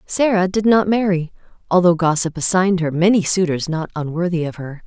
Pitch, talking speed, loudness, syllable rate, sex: 175 Hz, 175 wpm, -17 LUFS, 5.5 syllables/s, female